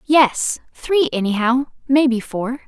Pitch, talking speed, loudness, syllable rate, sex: 255 Hz, 90 wpm, -18 LUFS, 3.8 syllables/s, female